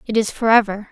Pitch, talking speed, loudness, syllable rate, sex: 215 Hz, 260 wpm, -17 LUFS, 6.3 syllables/s, female